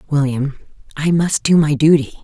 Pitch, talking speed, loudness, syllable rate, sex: 150 Hz, 160 wpm, -16 LUFS, 5.0 syllables/s, female